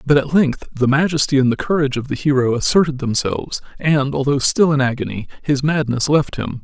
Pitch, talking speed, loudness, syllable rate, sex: 140 Hz, 200 wpm, -17 LUFS, 5.7 syllables/s, male